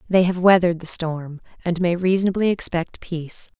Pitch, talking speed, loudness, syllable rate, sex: 175 Hz, 165 wpm, -21 LUFS, 5.5 syllables/s, female